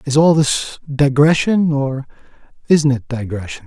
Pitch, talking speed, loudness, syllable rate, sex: 140 Hz, 130 wpm, -16 LUFS, 4.5 syllables/s, male